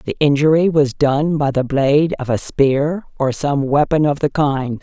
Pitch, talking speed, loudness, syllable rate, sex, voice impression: 145 Hz, 200 wpm, -16 LUFS, 4.4 syllables/s, female, feminine, middle-aged, slightly thick, tensed, powerful, clear, intellectual, calm, reassuring, elegant, slightly lively, slightly strict